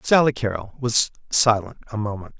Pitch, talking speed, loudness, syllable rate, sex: 115 Hz, 150 wpm, -21 LUFS, 5.2 syllables/s, male